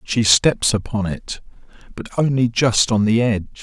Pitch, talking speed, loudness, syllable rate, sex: 110 Hz, 165 wpm, -18 LUFS, 4.5 syllables/s, male